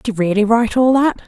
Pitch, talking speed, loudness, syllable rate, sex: 230 Hz, 280 wpm, -15 LUFS, 6.7 syllables/s, female